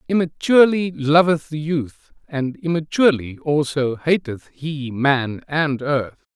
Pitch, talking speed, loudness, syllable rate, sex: 150 Hz, 115 wpm, -19 LUFS, 3.9 syllables/s, male